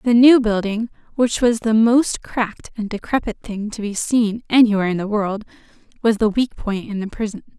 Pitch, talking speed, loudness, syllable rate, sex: 220 Hz, 200 wpm, -19 LUFS, 5.1 syllables/s, female